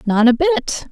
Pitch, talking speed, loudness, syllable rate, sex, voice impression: 260 Hz, 200 wpm, -15 LUFS, 3.8 syllables/s, female, very feminine, slightly adult-like, slightly soft, slightly cute, slightly calm, friendly, slightly sweet, kind